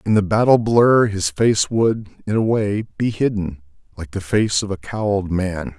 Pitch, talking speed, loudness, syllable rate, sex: 100 Hz, 195 wpm, -19 LUFS, 4.3 syllables/s, male